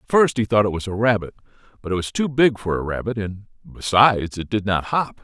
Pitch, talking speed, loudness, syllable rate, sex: 105 Hz, 250 wpm, -20 LUFS, 6.0 syllables/s, male